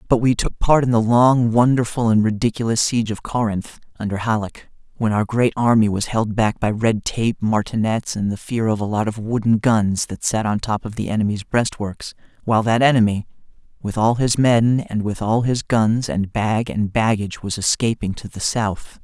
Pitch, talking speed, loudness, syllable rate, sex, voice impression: 110 Hz, 200 wpm, -19 LUFS, 5.0 syllables/s, male, masculine, adult-like, tensed, powerful, slightly bright, clear, slightly fluent, cool, intellectual, refreshing, calm, friendly, reassuring, lively, slightly kind